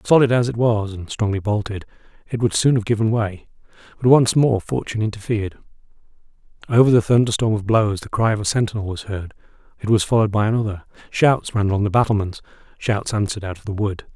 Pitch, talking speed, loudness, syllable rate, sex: 110 Hz, 195 wpm, -20 LUFS, 6.3 syllables/s, male